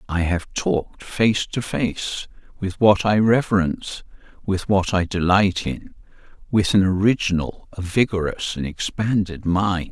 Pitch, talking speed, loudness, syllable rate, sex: 95 Hz, 135 wpm, -21 LUFS, 4.3 syllables/s, male